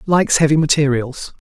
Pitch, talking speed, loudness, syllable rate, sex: 140 Hz, 125 wpm, -15 LUFS, 5.6 syllables/s, male